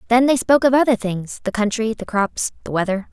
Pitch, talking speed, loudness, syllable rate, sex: 225 Hz, 230 wpm, -19 LUFS, 6.0 syllables/s, female